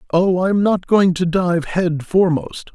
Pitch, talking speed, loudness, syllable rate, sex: 175 Hz, 195 wpm, -17 LUFS, 5.0 syllables/s, male